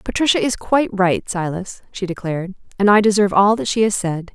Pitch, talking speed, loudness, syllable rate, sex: 195 Hz, 205 wpm, -18 LUFS, 5.9 syllables/s, female